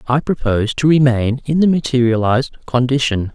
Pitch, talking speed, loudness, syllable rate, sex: 130 Hz, 145 wpm, -16 LUFS, 5.7 syllables/s, male